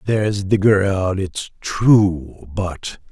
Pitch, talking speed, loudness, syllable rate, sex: 95 Hz, 115 wpm, -18 LUFS, 2.6 syllables/s, male